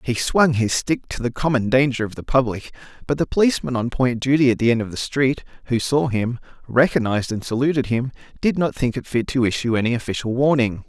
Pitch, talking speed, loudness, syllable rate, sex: 125 Hz, 220 wpm, -20 LUFS, 5.9 syllables/s, male